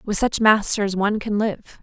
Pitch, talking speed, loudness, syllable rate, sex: 210 Hz, 195 wpm, -20 LUFS, 4.7 syllables/s, female